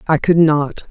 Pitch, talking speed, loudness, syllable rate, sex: 155 Hz, 200 wpm, -14 LUFS, 4.2 syllables/s, female